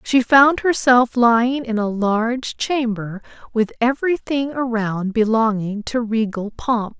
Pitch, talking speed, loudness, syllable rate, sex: 235 Hz, 130 wpm, -18 LUFS, 4.0 syllables/s, female